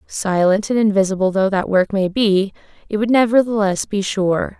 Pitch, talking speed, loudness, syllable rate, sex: 200 Hz, 170 wpm, -17 LUFS, 4.9 syllables/s, female